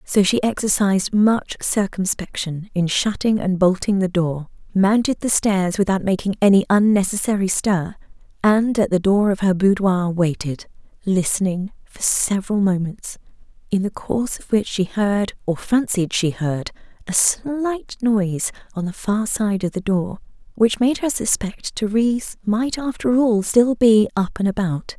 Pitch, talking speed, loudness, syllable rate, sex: 200 Hz, 155 wpm, -19 LUFS, 4.4 syllables/s, female